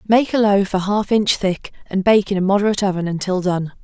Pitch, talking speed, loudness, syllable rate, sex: 195 Hz, 235 wpm, -18 LUFS, 5.7 syllables/s, female